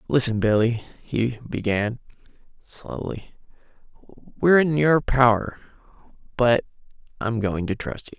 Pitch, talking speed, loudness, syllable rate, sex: 120 Hz, 110 wpm, -22 LUFS, 4.0 syllables/s, male